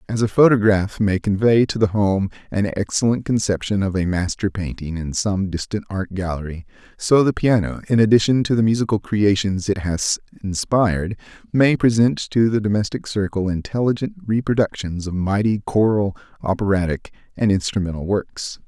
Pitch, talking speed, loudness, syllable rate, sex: 105 Hz, 150 wpm, -20 LUFS, 5.1 syllables/s, male